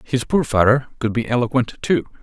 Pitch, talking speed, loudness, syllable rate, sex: 120 Hz, 190 wpm, -19 LUFS, 5.2 syllables/s, male